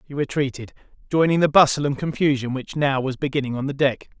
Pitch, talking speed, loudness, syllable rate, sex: 140 Hz, 200 wpm, -21 LUFS, 6.2 syllables/s, male